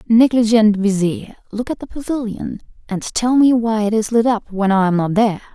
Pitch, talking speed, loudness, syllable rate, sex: 220 Hz, 205 wpm, -17 LUFS, 5.2 syllables/s, female